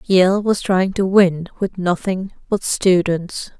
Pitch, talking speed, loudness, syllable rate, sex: 185 Hz, 150 wpm, -18 LUFS, 3.5 syllables/s, female